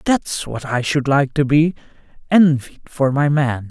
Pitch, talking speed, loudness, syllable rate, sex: 140 Hz, 160 wpm, -17 LUFS, 4.2 syllables/s, male